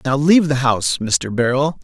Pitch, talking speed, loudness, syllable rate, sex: 135 Hz, 195 wpm, -16 LUFS, 5.3 syllables/s, male